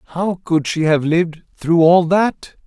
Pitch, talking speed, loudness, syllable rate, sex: 170 Hz, 180 wpm, -16 LUFS, 4.7 syllables/s, male